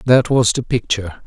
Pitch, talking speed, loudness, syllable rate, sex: 120 Hz, 190 wpm, -17 LUFS, 5.4 syllables/s, male